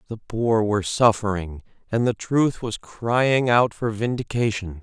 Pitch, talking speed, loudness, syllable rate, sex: 110 Hz, 150 wpm, -22 LUFS, 4.1 syllables/s, male